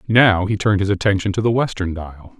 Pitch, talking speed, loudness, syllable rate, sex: 100 Hz, 225 wpm, -18 LUFS, 5.8 syllables/s, male